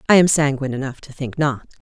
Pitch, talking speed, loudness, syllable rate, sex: 140 Hz, 220 wpm, -19 LUFS, 6.5 syllables/s, female